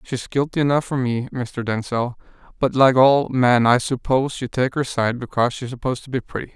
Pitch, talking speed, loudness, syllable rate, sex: 125 Hz, 230 wpm, -20 LUFS, 5.8 syllables/s, male